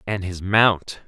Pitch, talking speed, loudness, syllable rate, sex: 95 Hz, 170 wpm, -20 LUFS, 3.3 syllables/s, male